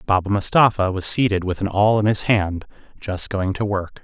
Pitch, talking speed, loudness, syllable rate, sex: 100 Hz, 210 wpm, -19 LUFS, 5.1 syllables/s, male